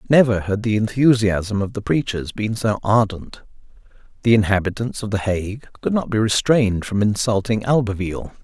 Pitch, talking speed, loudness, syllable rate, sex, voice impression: 105 Hz, 155 wpm, -19 LUFS, 5.3 syllables/s, male, very masculine, slightly old, very thick, tensed, very powerful, bright, slightly soft, clear, fluent, slightly raspy, very cool, intellectual, slightly refreshing, sincere, very calm, mature, friendly, very reassuring, unique, slightly elegant, wild, sweet, lively, kind, slightly intense